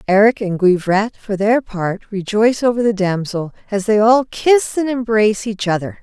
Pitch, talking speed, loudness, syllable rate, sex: 210 Hz, 180 wpm, -16 LUFS, 4.8 syllables/s, female